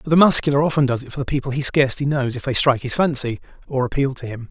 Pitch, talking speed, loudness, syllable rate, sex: 135 Hz, 265 wpm, -19 LUFS, 7.0 syllables/s, male